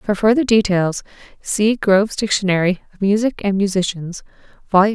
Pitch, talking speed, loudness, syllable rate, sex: 200 Hz, 135 wpm, -17 LUFS, 5.0 syllables/s, female